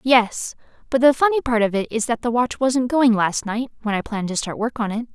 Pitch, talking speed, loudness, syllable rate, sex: 235 Hz, 270 wpm, -20 LUFS, 5.6 syllables/s, female